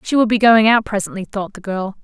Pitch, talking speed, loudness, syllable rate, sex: 205 Hz, 265 wpm, -16 LUFS, 5.8 syllables/s, female